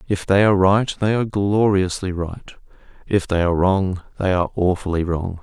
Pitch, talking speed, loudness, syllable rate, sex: 95 Hz, 175 wpm, -19 LUFS, 5.5 syllables/s, male